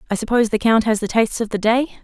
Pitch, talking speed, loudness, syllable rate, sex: 225 Hz, 295 wpm, -18 LUFS, 7.2 syllables/s, female